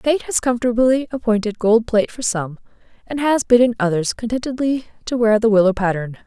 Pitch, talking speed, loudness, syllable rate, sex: 230 Hz, 170 wpm, -18 LUFS, 5.7 syllables/s, female